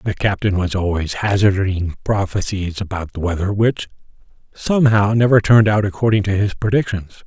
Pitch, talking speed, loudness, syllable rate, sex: 100 Hz, 150 wpm, -17 LUFS, 5.4 syllables/s, male